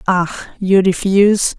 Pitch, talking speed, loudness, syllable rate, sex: 190 Hz, 115 wpm, -14 LUFS, 3.8 syllables/s, female